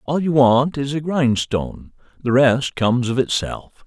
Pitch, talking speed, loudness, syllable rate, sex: 130 Hz, 170 wpm, -18 LUFS, 4.4 syllables/s, male